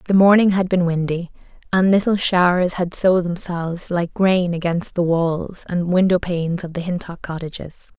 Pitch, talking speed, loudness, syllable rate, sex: 175 Hz, 175 wpm, -19 LUFS, 5.0 syllables/s, female